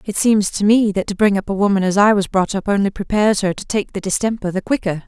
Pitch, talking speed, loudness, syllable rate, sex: 200 Hz, 285 wpm, -17 LUFS, 6.2 syllables/s, female